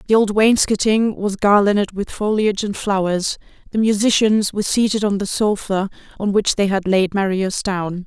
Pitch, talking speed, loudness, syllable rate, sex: 200 Hz, 170 wpm, -18 LUFS, 5.0 syllables/s, female